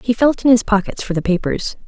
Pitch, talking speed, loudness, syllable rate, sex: 215 Hz, 255 wpm, -17 LUFS, 5.9 syllables/s, female